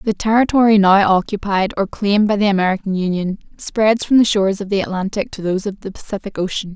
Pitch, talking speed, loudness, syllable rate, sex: 200 Hz, 205 wpm, -17 LUFS, 6.2 syllables/s, female